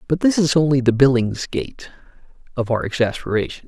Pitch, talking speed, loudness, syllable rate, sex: 130 Hz, 145 wpm, -19 LUFS, 6.0 syllables/s, male